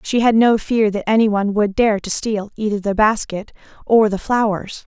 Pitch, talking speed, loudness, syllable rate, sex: 210 Hz, 205 wpm, -17 LUFS, 5.1 syllables/s, female